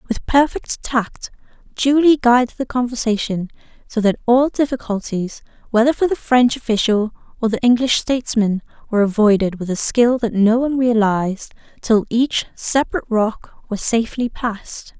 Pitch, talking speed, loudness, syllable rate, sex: 230 Hz, 145 wpm, -18 LUFS, 5.0 syllables/s, female